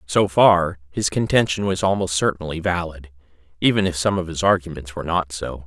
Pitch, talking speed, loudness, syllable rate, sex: 85 Hz, 180 wpm, -20 LUFS, 5.5 syllables/s, male